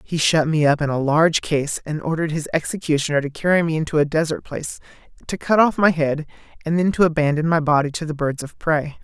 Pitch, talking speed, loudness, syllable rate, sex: 155 Hz, 230 wpm, -20 LUFS, 6.2 syllables/s, male